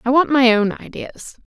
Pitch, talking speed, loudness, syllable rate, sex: 255 Hz, 205 wpm, -15 LUFS, 4.7 syllables/s, female